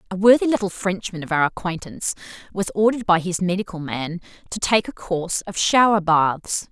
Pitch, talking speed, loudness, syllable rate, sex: 185 Hz, 180 wpm, -21 LUFS, 5.6 syllables/s, female